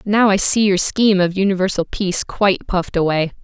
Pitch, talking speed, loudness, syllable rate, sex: 190 Hz, 190 wpm, -16 LUFS, 5.8 syllables/s, female